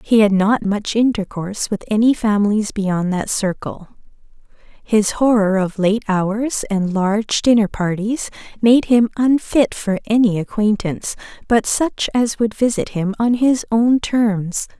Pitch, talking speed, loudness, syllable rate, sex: 215 Hz, 145 wpm, -17 LUFS, 4.2 syllables/s, female